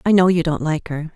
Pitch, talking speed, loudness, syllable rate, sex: 165 Hz, 310 wpm, -19 LUFS, 5.7 syllables/s, female